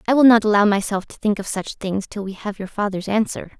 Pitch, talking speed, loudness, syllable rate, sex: 205 Hz, 265 wpm, -20 LUFS, 6.0 syllables/s, female